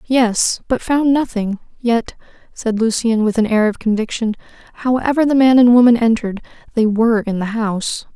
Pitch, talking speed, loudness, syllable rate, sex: 230 Hz, 170 wpm, -16 LUFS, 5.2 syllables/s, female